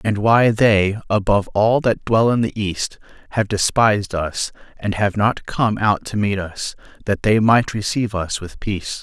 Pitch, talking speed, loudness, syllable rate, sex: 105 Hz, 185 wpm, -19 LUFS, 4.5 syllables/s, male